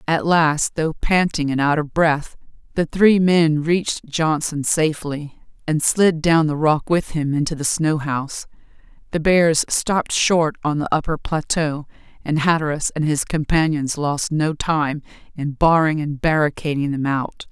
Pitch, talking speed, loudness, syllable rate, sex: 155 Hz, 160 wpm, -19 LUFS, 4.3 syllables/s, female